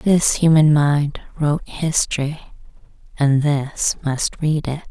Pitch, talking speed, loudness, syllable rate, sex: 150 Hz, 120 wpm, -18 LUFS, 3.6 syllables/s, female